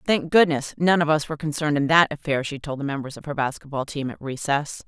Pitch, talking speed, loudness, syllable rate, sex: 150 Hz, 245 wpm, -23 LUFS, 6.2 syllables/s, female